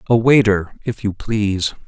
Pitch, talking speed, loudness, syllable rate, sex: 110 Hz, 160 wpm, -17 LUFS, 4.4 syllables/s, male